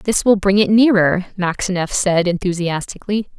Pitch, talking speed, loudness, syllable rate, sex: 190 Hz, 140 wpm, -16 LUFS, 5.0 syllables/s, female